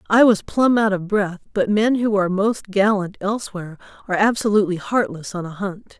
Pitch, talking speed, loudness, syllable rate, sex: 200 Hz, 190 wpm, -20 LUFS, 5.6 syllables/s, female